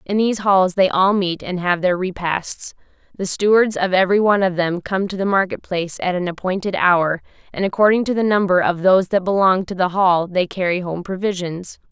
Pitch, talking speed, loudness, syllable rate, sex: 185 Hz, 210 wpm, -18 LUFS, 5.5 syllables/s, female